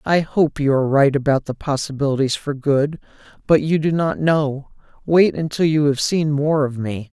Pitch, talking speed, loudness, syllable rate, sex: 145 Hz, 190 wpm, -19 LUFS, 4.8 syllables/s, male